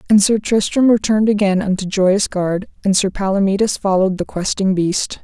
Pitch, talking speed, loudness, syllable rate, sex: 200 Hz, 170 wpm, -16 LUFS, 5.3 syllables/s, female